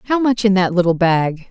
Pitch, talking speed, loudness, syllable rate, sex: 195 Hz, 240 wpm, -16 LUFS, 5.3 syllables/s, female